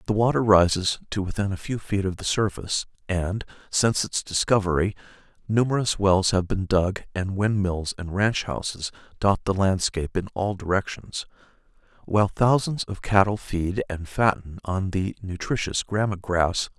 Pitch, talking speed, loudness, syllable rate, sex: 95 Hz, 155 wpm, -24 LUFS, 4.8 syllables/s, male